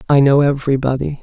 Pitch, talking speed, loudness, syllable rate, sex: 140 Hz, 145 wpm, -15 LUFS, 6.7 syllables/s, female